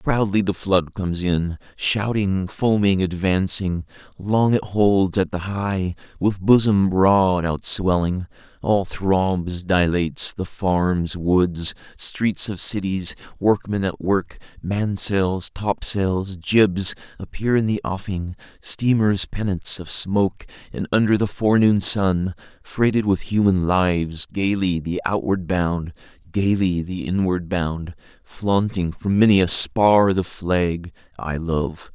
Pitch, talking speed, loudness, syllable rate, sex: 95 Hz, 120 wpm, -21 LUFS, 3.5 syllables/s, male